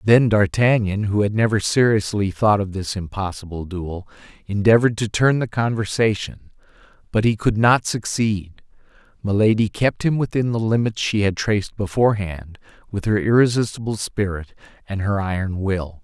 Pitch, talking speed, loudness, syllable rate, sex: 105 Hz, 145 wpm, -20 LUFS, 5.0 syllables/s, male